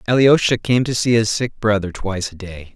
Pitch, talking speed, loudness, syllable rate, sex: 110 Hz, 215 wpm, -17 LUFS, 5.4 syllables/s, male